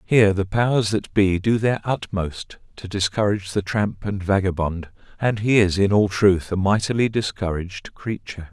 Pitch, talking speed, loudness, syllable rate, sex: 100 Hz, 170 wpm, -21 LUFS, 4.9 syllables/s, male